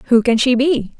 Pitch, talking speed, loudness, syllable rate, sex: 245 Hz, 240 wpm, -15 LUFS, 4.3 syllables/s, female